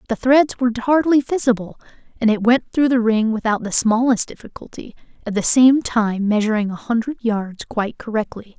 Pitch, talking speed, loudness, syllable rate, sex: 230 Hz, 175 wpm, -18 LUFS, 5.3 syllables/s, female